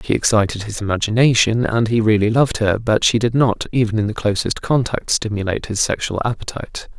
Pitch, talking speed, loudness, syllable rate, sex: 110 Hz, 190 wpm, -18 LUFS, 5.9 syllables/s, male